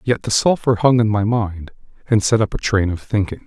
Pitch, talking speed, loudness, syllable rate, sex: 110 Hz, 240 wpm, -18 LUFS, 5.2 syllables/s, male